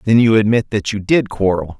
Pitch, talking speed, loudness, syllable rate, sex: 105 Hz, 235 wpm, -15 LUFS, 5.5 syllables/s, male